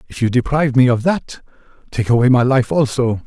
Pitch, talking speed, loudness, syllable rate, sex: 130 Hz, 200 wpm, -16 LUFS, 5.8 syllables/s, male